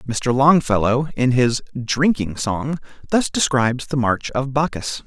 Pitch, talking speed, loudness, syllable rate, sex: 130 Hz, 140 wpm, -19 LUFS, 4.1 syllables/s, male